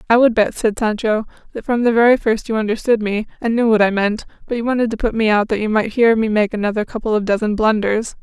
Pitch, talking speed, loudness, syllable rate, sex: 220 Hz, 265 wpm, -17 LUFS, 6.2 syllables/s, female